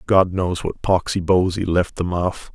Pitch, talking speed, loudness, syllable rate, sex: 90 Hz, 190 wpm, -20 LUFS, 4.2 syllables/s, male